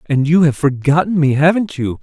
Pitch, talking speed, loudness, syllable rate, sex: 155 Hz, 210 wpm, -14 LUFS, 5.2 syllables/s, male